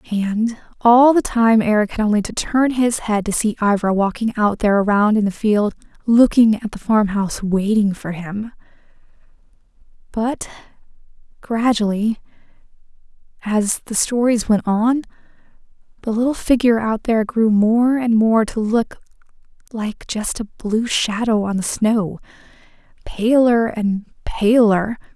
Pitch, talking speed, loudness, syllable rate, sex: 220 Hz, 140 wpm, -18 LUFS, 4.4 syllables/s, female